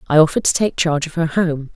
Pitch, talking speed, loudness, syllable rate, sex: 160 Hz, 275 wpm, -17 LUFS, 6.9 syllables/s, female